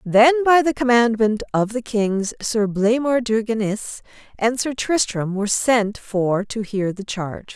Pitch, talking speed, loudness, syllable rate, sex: 225 Hz, 165 wpm, -20 LUFS, 4.3 syllables/s, female